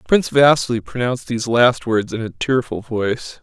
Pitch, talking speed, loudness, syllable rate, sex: 120 Hz, 175 wpm, -18 LUFS, 5.5 syllables/s, male